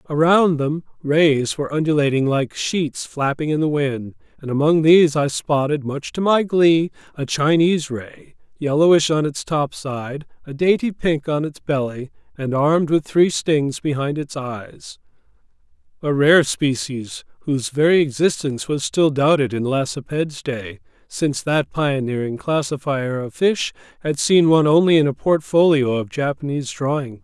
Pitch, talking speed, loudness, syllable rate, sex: 145 Hz, 150 wpm, -19 LUFS, 4.6 syllables/s, male